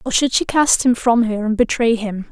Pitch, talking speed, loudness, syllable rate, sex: 235 Hz, 260 wpm, -16 LUFS, 5.1 syllables/s, female